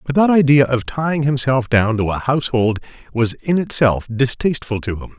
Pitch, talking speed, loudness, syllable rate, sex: 130 Hz, 185 wpm, -17 LUFS, 5.2 syllables/s, male